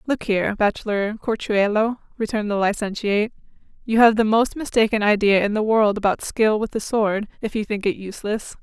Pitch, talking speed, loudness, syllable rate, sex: 215 Hz, 180 wpm, -21 LUFS, 5.5 syllables/s, female